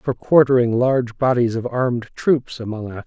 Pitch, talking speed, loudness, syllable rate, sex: 120 Hz, 175 wpm, -19 LUFS, 5.1 syllables/s, male